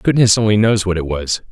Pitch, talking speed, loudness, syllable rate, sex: 100 Hz, 240 wpm, -15 LUFS, 5.7 syllables/s, male